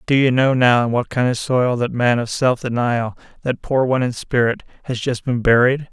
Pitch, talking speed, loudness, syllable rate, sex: 125 Hz, 235 wpm, -18 LUFS, 5.1 syllables/s, male